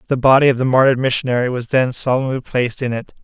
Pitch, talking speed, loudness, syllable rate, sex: 125 Hz, 225 wpm, -16 LUFS, 7.1 syllables/s, male